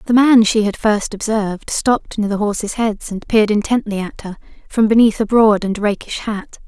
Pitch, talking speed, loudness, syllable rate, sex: 215 Hz, 205 wpm, -16 LUFS, 5.2 syllables/s, female